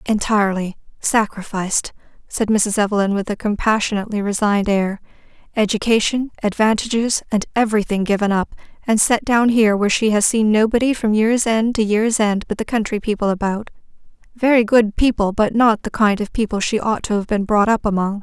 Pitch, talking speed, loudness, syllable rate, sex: 215 Hz, 160 wpm, -18 LUFS, 5.7 syllables/s, female